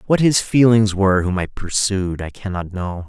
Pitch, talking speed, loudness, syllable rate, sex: 100 Hz, 195 wpm, -18 LUFS, 4.8 syllables/s, male